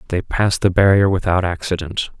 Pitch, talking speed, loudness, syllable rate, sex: 90 Hz, 165 wpm, -17 LUFS, 5.7 syllables/s, male